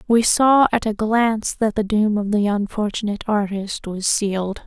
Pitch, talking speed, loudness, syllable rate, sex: 210 Hz, 180 wpm, -19 LUFS, 4.8 syllables/s, female